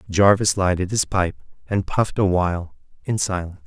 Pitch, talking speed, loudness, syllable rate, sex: 95 Hz, 165 wpm, -21 LUFS, 5.7 syllables/s, male